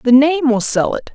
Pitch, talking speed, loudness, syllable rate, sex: 265 Hz, 260 wpm, -15 LUFS, 4.8 syllables/s, female